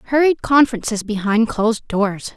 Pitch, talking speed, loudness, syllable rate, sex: 230 Hz, 125 wpm, -18 LUFS, 5.3 syllables/s, female